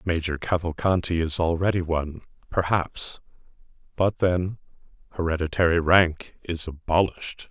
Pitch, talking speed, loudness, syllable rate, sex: 85 Hz, 95 wpm, -24 LUFS, 4.7 syllables/s, male